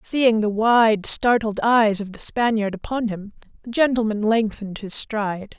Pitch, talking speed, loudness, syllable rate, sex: 220 Hz, 160 wpm, -20 LUFS, 4.5 syllables/s, female